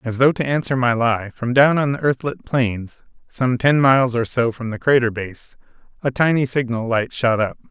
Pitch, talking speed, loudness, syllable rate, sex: 125 Hz, 210 wpm, -19 LUFS, 4.8 syllables/s, male